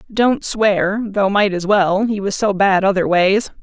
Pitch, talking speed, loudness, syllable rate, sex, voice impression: 200 Hz, 200 wpm, -16 LUFS, 3.9 syllables/s, female, feminine, very adult-like, slightly muffled, slightly fluent, slightly friendly, slightly unique